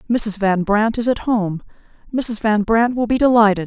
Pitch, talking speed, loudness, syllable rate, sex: 220 Hz, 195 wpm, -17 LUFS, 4.6 syllables/s, female